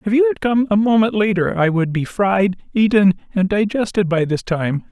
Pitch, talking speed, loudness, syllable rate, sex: 195 Hz, 210 wpm, -17 LUFS, 5.1 syllables/s, male